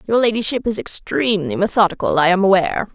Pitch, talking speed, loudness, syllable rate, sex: 200 Hz, 165 wpm, -17 LUFS, 6.5 syllables/s, female